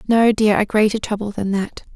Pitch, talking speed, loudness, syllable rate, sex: 210 Hz, 215 wpm, -18 LUFS, 5.4 syllables/s, female